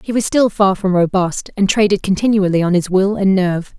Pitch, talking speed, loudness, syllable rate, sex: 195 Hz, 220 wpm, -15 LUFS, 5.5 syllables/s, female